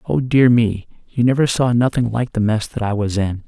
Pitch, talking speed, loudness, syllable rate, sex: 115 Hz, 240 wpm, -17 LUFS, 5.1 syllables/s, male